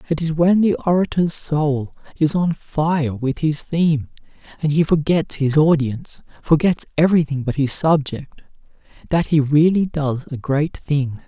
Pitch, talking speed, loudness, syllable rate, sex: 150 Hz, 155 wpm, -19 LUFS, 4.4 syllables/s, male